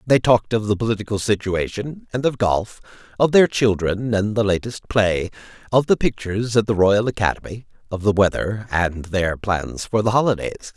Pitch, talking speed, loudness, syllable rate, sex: 105 Hz, 180 wpm, -20 LUFS, 5.2 syllables/s, male